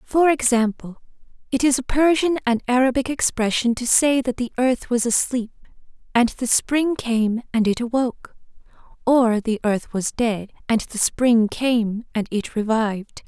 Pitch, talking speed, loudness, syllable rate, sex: 240 Hz, 160 wpm, -20 LUFS, 4.4 syllables/s, female